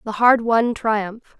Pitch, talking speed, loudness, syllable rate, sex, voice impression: 225 Hz, 170 wpm, -18 LUFS, 3.2 syllables/s, female, feminine, adult-like, slightly fluent, slightly intellectual, slightly calm